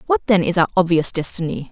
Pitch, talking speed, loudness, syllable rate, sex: 180 Hz, 210 wpm, -18 LUFS, 6.2 syllables/s, female